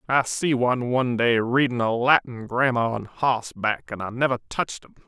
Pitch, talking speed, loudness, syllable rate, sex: 120 Hz, 190 wpm, -23 LUFS, 5.1 syllables/s, male